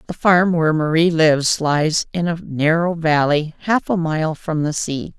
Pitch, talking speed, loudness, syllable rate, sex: 160 Hz, 185 wpm, -18 LUFS, 4.4 syllables/s, female